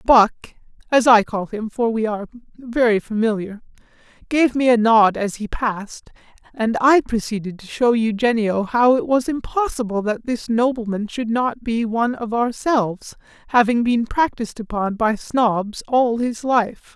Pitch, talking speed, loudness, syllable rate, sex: 230 Hz, 160 wpm, -19 LUFS, 4.0 syllables/s, male